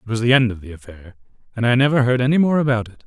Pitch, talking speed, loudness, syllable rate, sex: 120 Hz, 295 wpm, -17 LUFS, 7.2 syllables/s, male